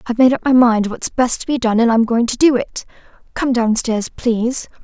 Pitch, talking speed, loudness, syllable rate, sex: 240 Hz, 250 wpm, -16 LUFS, 5.4 syllables/s, female